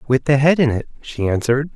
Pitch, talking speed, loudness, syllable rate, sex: 135 Hz, 240 wpm, -17 LUFS, 6.3 syllables/s, male